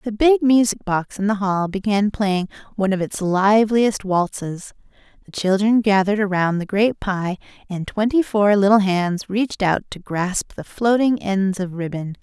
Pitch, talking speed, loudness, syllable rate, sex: 200 Hz, 170 wpm, -19 LUFS, 4.6 syllables/s, female